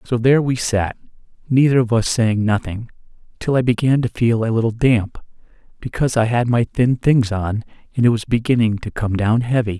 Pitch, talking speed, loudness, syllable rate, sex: 115 Hz, 195 wpm, -18 LUFS, 5.4 syllables/s, male